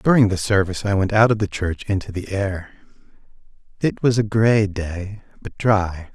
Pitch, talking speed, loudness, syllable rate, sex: 100 Hz, 185 wpm, -20 LUFS, 4.8 syllables/s, male